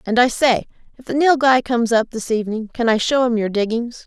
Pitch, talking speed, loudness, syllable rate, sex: 240 Hz, 235 wpm, -18 LUFS, 5.8 syllables/s, female